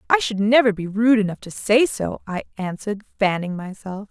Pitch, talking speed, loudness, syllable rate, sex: 210 Hz, 190 wpm, -21 LUFS, 5.3 syllables/s, female